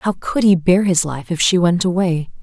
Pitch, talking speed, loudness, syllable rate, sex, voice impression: 175 Hz, 250 wpm, -16 LUFS, 4.8 syllables/s, female, feminine, adult-like, tensed, powerful, bright, clear, slightly raspy, calm, slightly friendly, elegant, lively, slightly kind, slightly modest